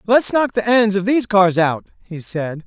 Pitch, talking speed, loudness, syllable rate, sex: 205 Hz, 225 wpm, -17 LUFS, 4.7 syllables/s, male